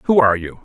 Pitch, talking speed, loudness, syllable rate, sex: 120 Hz, 280 wpm, -16 LUFS, 8.7 syllables/s, male